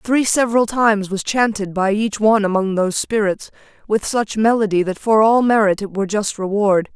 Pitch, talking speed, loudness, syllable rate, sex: 210 Hz, 190 wpm, -17 LUFS, 5.4 syllables/s, female